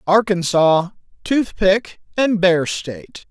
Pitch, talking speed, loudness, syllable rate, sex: 190 Hz, 90 wpm, -17 LUFS, 3.5 syllables/s, male